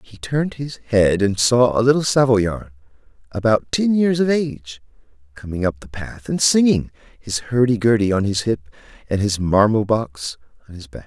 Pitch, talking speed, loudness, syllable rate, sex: 110 Hz, 180 wpm, -18 LUFS, 4.8 syllables/s, male